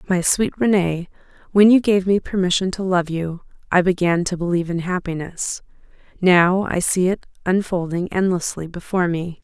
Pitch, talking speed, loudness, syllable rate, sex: 180 Hz, 155 wpm, -19 LUFS, 5.0 syllables/s, female